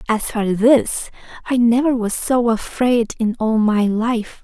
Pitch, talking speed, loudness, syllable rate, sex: 230 Hz, 160 wpm, -17 LUFS, 3.8 syllables/s, female